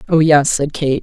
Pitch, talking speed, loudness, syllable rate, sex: 150 Hz, 235 wpm, -14 LUFS, 4.4 syllables/s, female